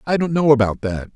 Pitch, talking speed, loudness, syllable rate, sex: 130 Hz, 260 wpm, -18 LUFS, 5.8 syllables/s, male